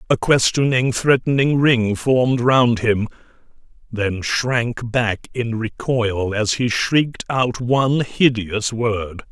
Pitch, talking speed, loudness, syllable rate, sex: 120 Hz, 120 wpm, -18 LUFS, 3.4 syllables/s, male